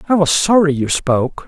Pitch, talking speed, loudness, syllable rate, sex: 160 Hz, 205 wpm, -15 LUFS, 5.4 syllables/s, male